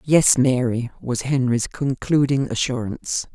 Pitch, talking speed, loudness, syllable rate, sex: 130 Hz, 110 wpm, -21 LUFS, 4.2 syllables/s, female